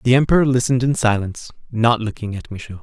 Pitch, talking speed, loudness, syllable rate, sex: 120 Hz, 190 wpm, -18 LUFS, 6.8 syllables/s, male